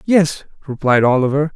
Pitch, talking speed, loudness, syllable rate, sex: 145 Hz, 115 wpm, -16 LUFS, 4.8 syllables/s, male